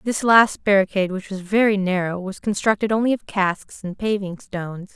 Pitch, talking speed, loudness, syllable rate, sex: 200 Hz, 180 wpm, -20 LUFS, 5.2 syllables/s, female